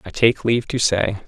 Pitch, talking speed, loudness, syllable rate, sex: 110 Hz, 235 wpm, -19 LUFS, 5.2 syllables/s, male